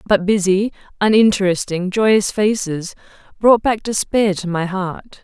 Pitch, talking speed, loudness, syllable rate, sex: 200 Hz, 125 wpm, -17 LUFS, 4.1 syllables/s, female